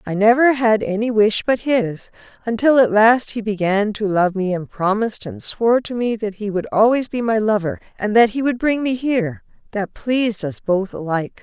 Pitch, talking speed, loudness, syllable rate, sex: 215 Hz, 210 wpm, -18 LUFS, 5.0 syllables/s, female